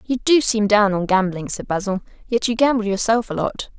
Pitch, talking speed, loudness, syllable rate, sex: 210 Hz, 220 wpm, -19 LUFS, 5.3 syllables/s, female